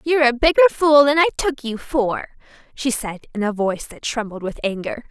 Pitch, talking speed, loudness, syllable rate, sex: 255 Hz, 210 wpm, -19 LUFS, 5.4 syllables/s, female